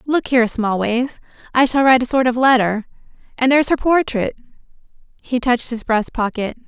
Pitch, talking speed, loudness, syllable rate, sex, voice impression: 245 Hz, 160 wpm, -17 LUFS, 5.7 syllables/s, female, feminine, slightly young, tensed, clear, fluent, intellectual, calm, lively, slightly intense, sharp, light